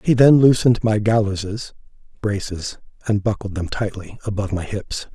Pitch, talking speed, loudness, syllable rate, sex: 105 Hz, 150 wpm, -20 LUFS, 5.5 syllables/s, male